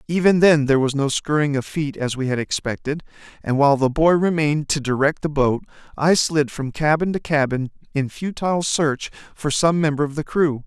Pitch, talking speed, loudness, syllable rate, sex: 150 Hz, 200 wpm, -20 LUFS, 5.4 syllables/s, male